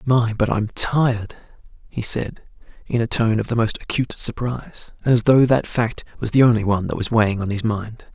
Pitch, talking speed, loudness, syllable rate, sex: 115 Hz, 215 wpm, -20 LUFS, 5.3 syllables/s, male